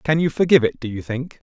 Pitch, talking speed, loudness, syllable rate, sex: 140 Hz, 275 wpm, -20 LUFS, 6.8 syllables/s, male